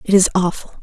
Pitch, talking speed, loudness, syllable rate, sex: 185 Hz, 220 wpm, -16 LUFS, 6.5 syllables/s, female